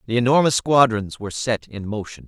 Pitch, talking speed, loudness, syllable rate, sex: 115 Hz, 185 wpm, -20 LUFS, 5.7 syllables/s, male